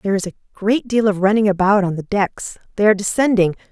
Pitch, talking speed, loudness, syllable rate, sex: 200 Hz, 210 wpm, -17 LUFS, 6.3 syllables/s, female